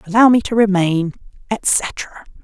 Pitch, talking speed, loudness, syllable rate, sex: 200 Hz, 125 wpm, -16 LUFS, 3.9 syllables/s, female